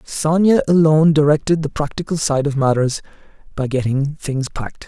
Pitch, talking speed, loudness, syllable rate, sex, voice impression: 150 Hz, 150 wpm, -17 LUFS, 5.3 syllables/s, male, masculine, slightly gender-neutral, adult-like, slightly thick, tensed, slightly powerful, dark, soft, muffled, slightly halting, slightly raspy, slightly cool, intellectual, slightly refreshing, sincere, calm, slightly mature, slightly friendly, slightly reassuring, very unique, slightly elegant, slightly wild, slightly sweet, slightly lively, kind, modest